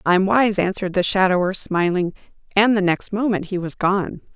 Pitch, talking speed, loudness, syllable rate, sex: 190 Hz, 180 wpm, -19 LUFS, 5.1 syllables/s, female